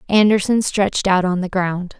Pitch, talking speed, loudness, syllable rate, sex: 190 Hz, 180 wpm, -17 LUFS, 5.0 syllables/s, female